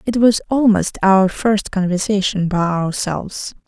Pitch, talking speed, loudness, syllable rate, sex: 195 Hz, 130 wpm, -17 LUFS, 4.2 syllables/s, female